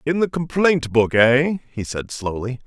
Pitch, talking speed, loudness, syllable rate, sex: 135 Hz, 180 wpm, -19 LUFS, 4.1 syllables/s, male